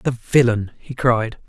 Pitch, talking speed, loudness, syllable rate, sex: 120 Hz, 160 wpm, -19 LUFS, 4.0 syllables/s, male